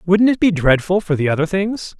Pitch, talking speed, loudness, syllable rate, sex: 180 Hz, 240 wpm, -16 LUFS, 5.1 syllables/s, male